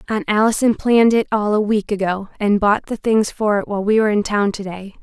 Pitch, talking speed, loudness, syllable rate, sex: 210 Hz, 250 wpm, -17 LUFS, 5.9 syllables/s, female